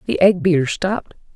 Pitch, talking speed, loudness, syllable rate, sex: 175 Hz, 180 wpm, -18 LUFS, 5.9 syllables/s, female